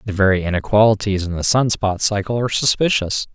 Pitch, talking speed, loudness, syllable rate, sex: 105 Hz, 180 wpm, -17 LUFS, 6.0 syllables/s, male